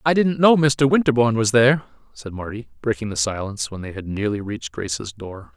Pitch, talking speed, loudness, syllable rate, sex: 115 Hz, 205 wpm, -20 LUFS, 6.0 syllables/s, male